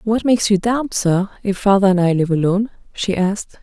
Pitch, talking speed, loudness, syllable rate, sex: 200 Hz, 215 wpm, -17 LUFS, 5.8 syllables/s, female